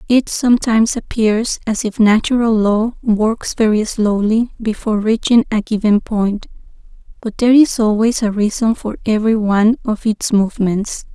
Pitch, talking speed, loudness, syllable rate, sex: 220 Hz, 145 wpm, -15 LUFS, 4.8 syllables/s, female